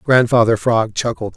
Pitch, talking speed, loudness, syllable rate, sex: 115 Hz, 130 wpm, -16 LUFS, 4.6 syllables/s, male